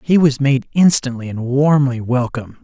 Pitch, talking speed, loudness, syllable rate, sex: 135 Hz, 160 wpm, -16 LUFS, 4.9 syllables/s, male